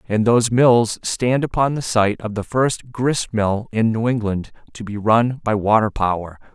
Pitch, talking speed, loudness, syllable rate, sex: 115 Hz, 190 wpm, -19 LUFS, 4.4 syllables/s, male